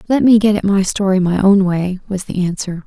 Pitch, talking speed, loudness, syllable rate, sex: 195 Hz, 230 wpm, -15 LUFS, 5.4 syllables/s, female